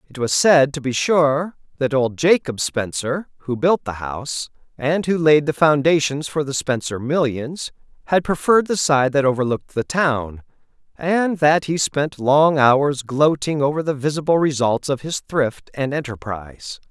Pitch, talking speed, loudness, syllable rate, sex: 145 Hz, 165 wpm, -19 LUFS, 4.4 syllables/s, male